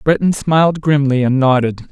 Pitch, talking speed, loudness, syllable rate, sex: 140 Hz, 155 wpm, -14 LUFS, 5.1 syllables/s, male